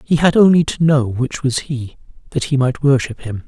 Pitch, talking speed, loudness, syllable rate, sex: 140 Hz, 225 wpm, -16 LUFS, 5.0 syllables/s, male